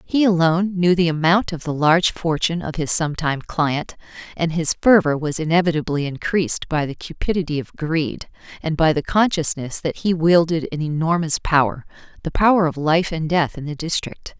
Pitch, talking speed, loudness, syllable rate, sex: 165 Hz, 180 wpm, -20 LUFS, 5.4 syllables/s, female